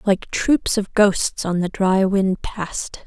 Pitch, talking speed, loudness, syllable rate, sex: 195 Hz, 175 wpm, -20 LUFS, 3.1 syllables/s, female